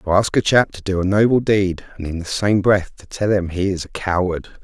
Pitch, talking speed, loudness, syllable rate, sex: 95 Hz, 270 wpm, -19 LUFS, 5.4 syllables/s, male